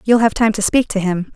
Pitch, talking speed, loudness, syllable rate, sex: 215 Hz, 310 wpm, -16 LUFS, 5.6 syllables/s, female